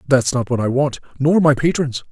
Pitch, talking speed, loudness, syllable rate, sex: 135 Hz, 225 wpm, -17 LUFS, 5.2 syllables/s, male